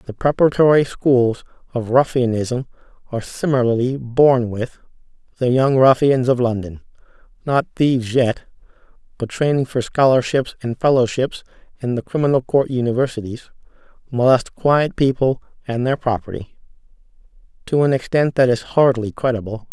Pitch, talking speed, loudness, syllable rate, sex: 130 Hz, 120 wpm, -18 LUFS, 5.1 syllables/s, male